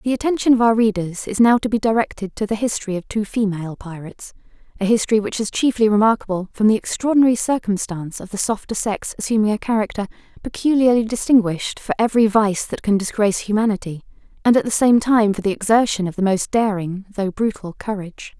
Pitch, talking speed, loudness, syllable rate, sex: 215 Hz, 185 wpm, -19 LUFS, 6.3 syllables/s, female